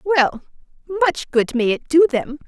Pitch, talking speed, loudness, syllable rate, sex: 285 Hz, 170 wpm, -18 LUFS, 4.2 syllables/s, female